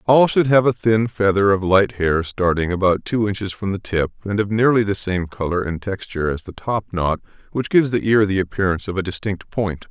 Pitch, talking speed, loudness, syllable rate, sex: 100 Hz, 225 wpm, -19 LUFS, 5.5 syllables/s, male